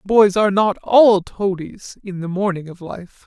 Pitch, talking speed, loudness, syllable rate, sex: 195 Hz, 185 wpm, -17 LUFS, 4.3 syllables/s, male